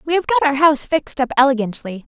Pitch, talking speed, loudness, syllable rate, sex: 280 Hz, 225 wpm, -17 LUFS, 6.7 syllables/s, female